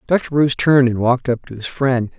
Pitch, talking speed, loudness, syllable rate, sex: 130 Hz, 245 wpm, -17 LUFS, 6.3 syllables/s, male